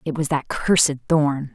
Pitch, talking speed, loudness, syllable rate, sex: 145 Hz, 195 wpm, -20 LUFS, 4.6 syllables/s, female